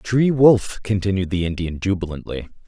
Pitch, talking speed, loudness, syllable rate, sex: 100 Hz, 135 wpm, -19 LUFS, 4.9 syllables/s, male